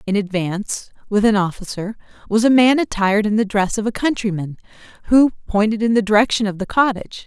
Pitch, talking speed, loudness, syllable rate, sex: 210 Hz, 190 wpm, -18 LUFS, 6.0 syllables/s, female